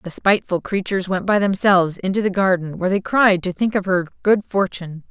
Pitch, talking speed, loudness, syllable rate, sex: 190 Hz, 210 wpm, -19 LUFS, 6.0 syllables/s, female